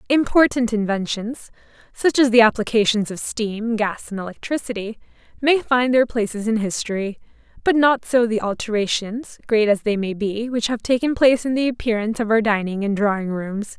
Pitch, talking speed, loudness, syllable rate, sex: 225 Hz, 175 wpm, -20 LUFS, 5.2 syllables/s, female